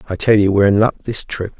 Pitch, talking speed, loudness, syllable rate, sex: 100 Hz, 300 wpm, -15 LUFS, 6.6 syllables/s, male